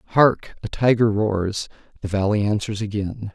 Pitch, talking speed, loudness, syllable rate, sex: 105 Hz, 125 wpm, -21 LUFS, 4.4 syllables/s, male